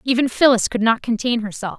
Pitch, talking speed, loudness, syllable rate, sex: 235 Hz, 200 wpm, -18 LUFS, 5.9 syllables/s, female